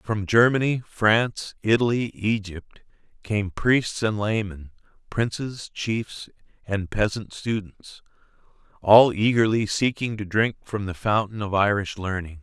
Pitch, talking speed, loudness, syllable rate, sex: 105 Hz, 115 wpm, -23 LUFS, 4.0 syllables/s, male